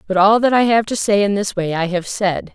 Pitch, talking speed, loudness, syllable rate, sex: 200 Hz, 305 wpm, -16 LUFS, 5.4 syllables/s, female